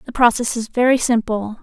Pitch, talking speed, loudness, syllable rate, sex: 235 Hz, 185 wpm, -17 LUFS, 5.4 syllables/s, female